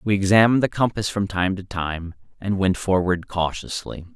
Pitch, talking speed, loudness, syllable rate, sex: 95 Hz, 175 wpm, -22 LUFS, 5.0 syllables/s, male